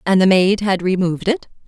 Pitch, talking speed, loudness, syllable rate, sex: 190 Hz, 215 wpm, -16 LUFS, 5.7 syllables/s, female